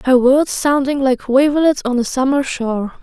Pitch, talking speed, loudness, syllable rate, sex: 265 Hz, 180 wpm, -15 LUFS, 4.9 syllables/s, female